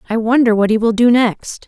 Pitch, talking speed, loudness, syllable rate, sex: 230 Hz, 250 wpm, -13 LUFS, 5.4 syllables/s, female